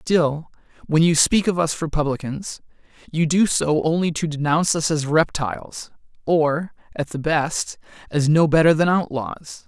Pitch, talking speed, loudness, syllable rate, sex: 160 Hz, 155 wpm, -20 LUFS, 4.5 syllables/s, male